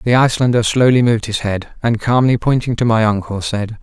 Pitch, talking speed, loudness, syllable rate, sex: 115 Hz, 205 wpm, -15 LUFS, 5.8 syllables/s, male